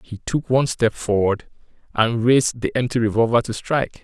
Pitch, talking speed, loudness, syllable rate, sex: 115 Hz, 180 wpm, -20 LUFS, 5.4 syllables/s, male